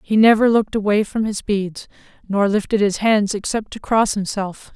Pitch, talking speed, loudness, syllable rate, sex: 205 Hz, 190 wpm, -18 LUFS, 4.9 syllables/s, female